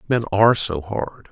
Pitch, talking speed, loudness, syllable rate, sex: 105 Hz, 180 wpm, -20 LUFS, 4.8 syllables/s, male